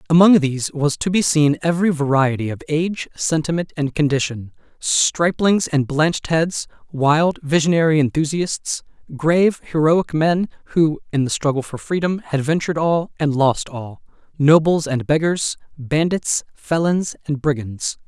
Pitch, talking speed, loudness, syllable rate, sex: 155 Hz, 135 wpm, -19 LUFS, 4.6 syllables/s, male